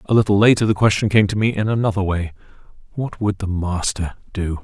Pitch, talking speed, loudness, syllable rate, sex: 100 Hz, 205 wpm, -19 LUFS, 6.0 syllables/s, male